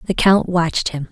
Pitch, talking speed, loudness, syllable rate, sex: 170 Hz, 215 wpm, -17 LUFS, 5.3 syllables/s, female